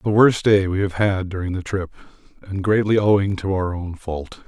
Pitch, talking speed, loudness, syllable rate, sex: 95 Hz, 215 wpm, -20 LUFS, 5.0 syllables/s, male